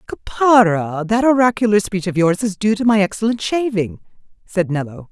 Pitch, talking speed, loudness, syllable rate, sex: 205 Hz, 165 wpm, -17 LUFS, 5.6 syllables/s, female